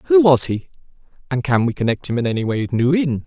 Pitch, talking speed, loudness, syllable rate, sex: 135 Hz, 255 wpm, -18 LUFS, 6.1 syllables/s, male